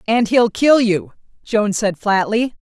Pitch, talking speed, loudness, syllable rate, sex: 215 Hz, 160 wpm, -16 LUFS, 4.3 syllables/s, female